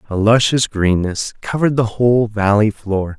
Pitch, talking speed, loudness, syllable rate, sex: 110 Hz, 150 wpm, -16 LUFS, 4.8 syllables/s, male